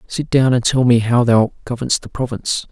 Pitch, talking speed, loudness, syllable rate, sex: 125 Hz, 220 wpm, -16 LUFS, 5.8 syllables/s, male